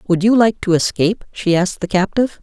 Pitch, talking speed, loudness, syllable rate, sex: 190 Hz, 225 wpm, -16 LUFS, 6.2 syllables/s, female